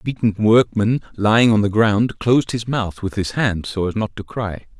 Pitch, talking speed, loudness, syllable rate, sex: 105 Hz, 225 wpm, -18 LUFS, 5.0 syllables/s, male